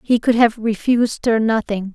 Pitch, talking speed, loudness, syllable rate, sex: 225 Hz, 185 wpm, -17 LUFS, 4.9 syllables/s, female